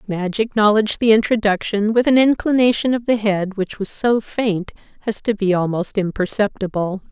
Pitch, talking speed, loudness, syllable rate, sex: 210 Hz, 160 wpm, -18 LUFS, 5.2 syllables/s, female